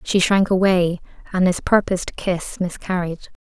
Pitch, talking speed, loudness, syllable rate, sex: 180 Hz, 140 wpm, -20 LUFS, 4.5 syllables/s, female